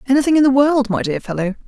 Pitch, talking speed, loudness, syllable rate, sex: 250 Hz, 250 wpm, -16 LUFS, 7.0 syllables/s, female